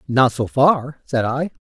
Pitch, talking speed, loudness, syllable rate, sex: 135 Hz, 185 wpm, -18 LUFS, 3.7 syllables/s, male